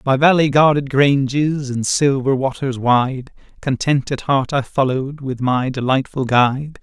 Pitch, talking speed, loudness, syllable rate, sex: 135 Hz, 150 wpm, -17 LUFS, 4.3 syllables/s, male